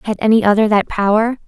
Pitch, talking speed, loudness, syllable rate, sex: 210 Hz, 205 wpm, -14 LUFS, 6.5 syllables/s, female